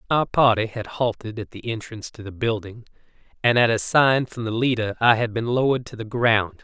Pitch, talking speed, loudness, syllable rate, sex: 115 Hz, 215 wpm, -22 LUFS, 5.5 syllables/s, male